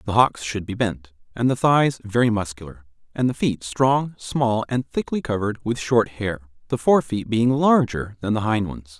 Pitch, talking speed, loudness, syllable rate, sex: 115 Hz, 200 wpm, -22 LUFS, 4.7 syllables/s, male